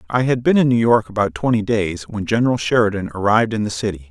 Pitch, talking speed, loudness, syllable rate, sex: 110 Hz, 235 wpm, -18 LUFS, 6.5 syllables/s, male